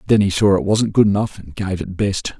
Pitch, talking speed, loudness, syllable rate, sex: 100 Hz, 275 wpm, -18 LUFS, 5.6 syllables/s, male